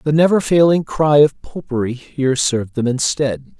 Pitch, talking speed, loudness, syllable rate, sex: 140 Hz, 185 wpm, -16 LUFS, 4.9 syllables/s, male